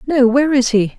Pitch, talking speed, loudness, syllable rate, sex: 255 Hz, 245 wpm, -14 LUFS, 6.0 syllables/s, female